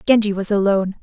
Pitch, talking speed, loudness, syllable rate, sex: 200 Hz, 175 wpm, -18 LUFS, 7.1 syllables/s, female